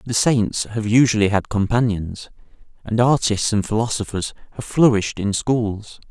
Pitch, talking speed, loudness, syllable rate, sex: 110 Hz, 140 wpm, -19 LUFS, 4.7 syllables/s, male